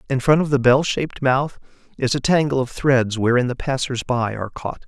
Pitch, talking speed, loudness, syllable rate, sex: 130 Hz, 220 wpm, -20 LUFS, 5.4 syllables/s, male